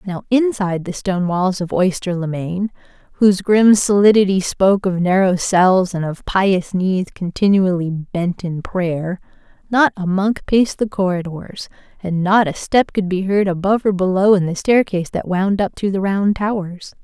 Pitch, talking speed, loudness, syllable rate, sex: 190 Hz, 175 wpm, -17 LUFS, 4.7 syllables/s, female